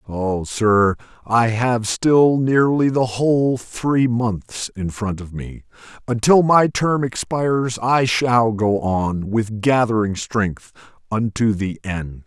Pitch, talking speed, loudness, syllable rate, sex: 115 Hz, 135 wpm, -19 LUFS, 3.3 syllables/s, male